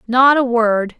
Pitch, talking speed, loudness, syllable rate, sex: 240 Hz, 180 wpm, -14 LUFS, 3.6 syllables/s, female